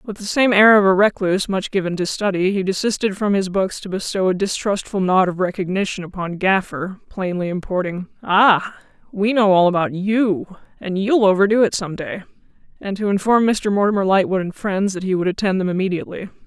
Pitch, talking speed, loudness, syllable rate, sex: 195 Hz, 195 wpm, -18 LUFS, 5.5 syllables/s, female